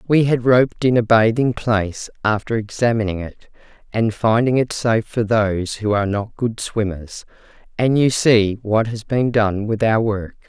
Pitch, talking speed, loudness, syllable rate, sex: 110 Hz, 175 wpm, -18 LUFS, 4.7 syllables/s, female